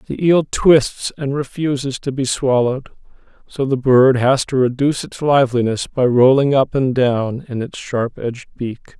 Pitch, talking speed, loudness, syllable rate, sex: 130 Hz, 175 wpm, -17 LUFS, 4.6 syllables/s, male